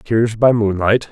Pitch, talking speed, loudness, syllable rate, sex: 110 Hz, 160 wpm, -15 LUFS, 4.0 syllables/s, male